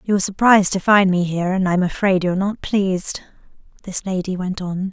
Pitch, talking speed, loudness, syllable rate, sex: 190 Hz, 195 wpm, -18 LUFS, 5.7 syllables/s, female